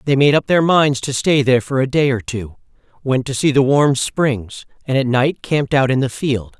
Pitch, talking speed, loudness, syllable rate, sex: 135 Hz, 245 wpm, -16 LUFS, 5.1 syllables/s, male